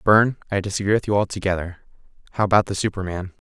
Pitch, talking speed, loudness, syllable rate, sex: 100 Hz, 175 wpm, -22 LUFS, 7.2 syllables/s, male